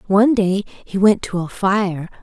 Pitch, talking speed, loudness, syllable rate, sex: 195 Hz, 190 wpm, -18 LUFS, 4.2 syllables/s, female